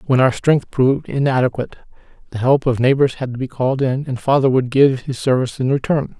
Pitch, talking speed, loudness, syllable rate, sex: 130 Hz, 215 wpm, -17 LUFS, 6.1 syllables/s, male